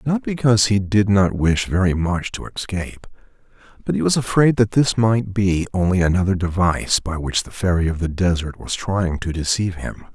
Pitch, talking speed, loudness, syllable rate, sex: 95 Hz, 195 wpm, -19 LUFS, 5.3 syllables/s, male